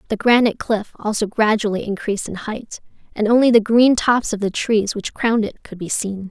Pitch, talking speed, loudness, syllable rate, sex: 215 Hz, 210 wpm, -18 LUFS, 5.4 syllables/s, female